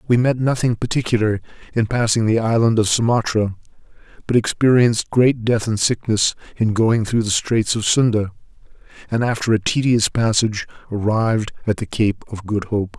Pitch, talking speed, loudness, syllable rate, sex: 110 Hz, 160 wpm, -18 LUFS, 5.2 syllables/s, male